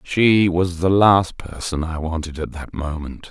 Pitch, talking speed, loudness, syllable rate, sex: 85 Hz, 180 wpm, -19 LUFS, 4.1 syllables/s, male